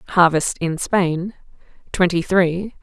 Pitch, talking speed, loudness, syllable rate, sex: 175 Hz, 105 wpm, -19 LUFS, 3.5 syllables/s, female